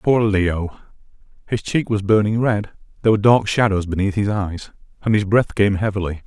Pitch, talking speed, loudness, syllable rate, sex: 105 Hz, 180 wpm, -19 LUFS, 5.3 syllables/s, male